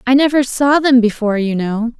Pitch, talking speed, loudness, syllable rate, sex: 245 Hz, 210 wpm, -14 LUFS, 5.5 syllables/s, female